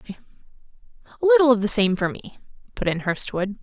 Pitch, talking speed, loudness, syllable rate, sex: 220 Hz, 165 wpm, -20 LUFS, 5.9 syllables/s, female